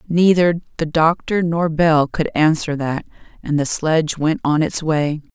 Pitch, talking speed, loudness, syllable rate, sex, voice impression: 160 Hz, 170 wpm, -18 LUFS, 4.3 syllables/s, female, feminine, gender-neutral, adult-like, slightly thin, tensed, slightly powerful, slightly dark, hard, very clear, fluent, very cool, very intellectual, refreshing, very sincere, slightly calm, very friendly, very reassuring, very unique, very elegant, wild, sweet, lively, slightly kind, intense, slightly light